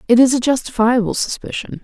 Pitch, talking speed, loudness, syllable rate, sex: 245 Hz, 165 wpm, -16 LUFS, 6.1 syllables/s, female